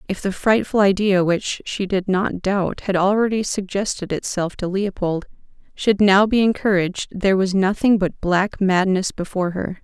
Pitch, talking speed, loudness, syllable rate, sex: 195 Hz, 165 wpm, -19 LUFS, 4.7 syllables/s, female